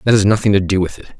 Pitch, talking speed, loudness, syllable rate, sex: 100 Hz, 350 wpm, -15 LUFS, 8.3 syllables/s, male